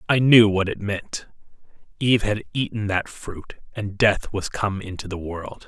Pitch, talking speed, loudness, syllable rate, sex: 100 Hz, 170 wpm, -22 LUFS, 4.4 syllables/s, male